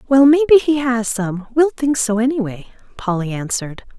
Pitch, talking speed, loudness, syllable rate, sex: 245 Hz, 165 wpm, -17 LUFS, 4.9 syllables/s, female